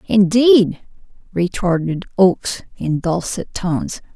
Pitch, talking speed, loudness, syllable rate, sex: 190 Hz, 85 wpm, -17 LUFS, 3.7 syllables/s, female